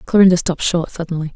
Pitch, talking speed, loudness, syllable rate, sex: 170 Hz, 175 wpm, -16 LUFS, 7.3 syllables/s, female